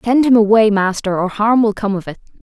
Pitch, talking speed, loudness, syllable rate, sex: 215 Hz, 245 wpm, -14 LUFS, 5.7 syllables/s, female